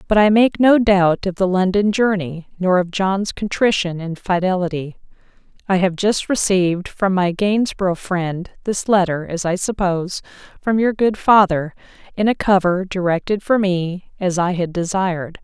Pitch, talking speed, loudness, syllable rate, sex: 190 Hz, 165 wpm, -18 LUFS, 4.6 syllables/s, female